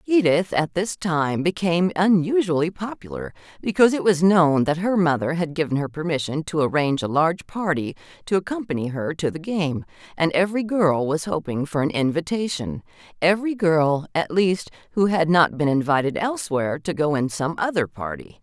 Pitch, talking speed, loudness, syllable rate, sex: 165 Hz, 170 wpm, -22 LUFS, 5.3 syllables/s, female